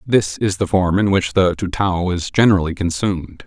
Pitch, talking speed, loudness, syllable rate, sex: 95 Hz, 190 wpm, -18 LUFS, 5.1 syllables/s, male